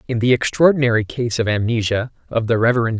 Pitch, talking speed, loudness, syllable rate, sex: 115 Hz, 180 wpm, -18 LUFS, 5.6 syllables/s, male